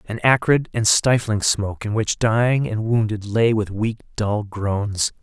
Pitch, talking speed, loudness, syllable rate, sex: 110 Hz, 170 wpm, -20 LUFS, 4.2 syllables/s, male